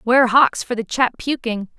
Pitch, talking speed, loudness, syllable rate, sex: 240 Hz, 200 wpm, -18 LUFS, 4.2 syllables/s, female